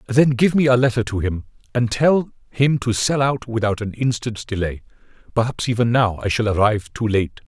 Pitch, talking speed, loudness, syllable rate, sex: 115 Hz, 200 wpm, -20 LUFS, 5.3 syllables/s, male